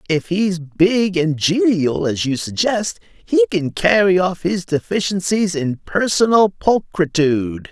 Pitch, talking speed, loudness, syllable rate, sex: 180 Hz, 130 wpm, -17 LUFS, 3.9 syllables/s, male